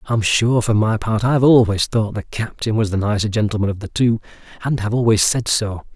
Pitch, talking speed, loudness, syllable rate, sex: 110 Hz, 210 wpm, -18 LUFS, 5.4 syllables/s, male